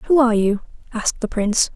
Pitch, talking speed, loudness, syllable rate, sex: 225 Hz, 205 wpm, -19 LUFS, 6.8 syllables/s, female